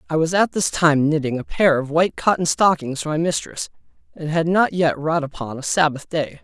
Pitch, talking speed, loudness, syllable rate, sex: 160 Hz, 225 wpm, -19 LUFS, 5.4 syllables/s, male